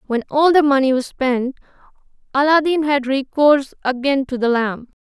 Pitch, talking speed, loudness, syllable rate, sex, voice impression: 270 Hz, 155 wpm, -17 LUFS, 5.0 syllables/s, female, very feminine, slightly gender-neutral, very young, very thin, tensed, slightly weak, very bright, hard, very clear, slightly halting, very cute, slightly intellectual, very refreshing, sincere, slightly calm, friendly, slightly reassuring, very unique, slightly wild, slightly sweet, lively, slightly strict, slightly intense, slightly sharp, very light